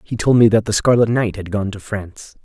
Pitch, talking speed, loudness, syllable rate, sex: 105 Hz, 270 wpm, -17 LUFS, 5.7 syllables/s, male